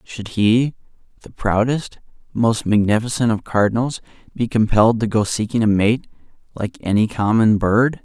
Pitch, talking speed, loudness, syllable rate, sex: 110 Hz, 140 wpm, -18 LUFS, 4.8 syllables/s, male